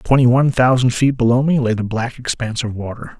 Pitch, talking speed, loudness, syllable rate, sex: 125 Hz, 225 wpm, -16 LUFS, 6.0 syllables/s, male